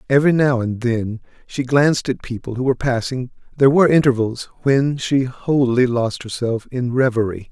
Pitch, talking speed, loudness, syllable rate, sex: 125 Hz, 170 wpm, -18 LUFS, 5.3 syllables/s, male